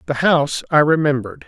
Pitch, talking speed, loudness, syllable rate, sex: 145 Hz, 165 wpm, -17 LUFS, 6.5 syllables/s, male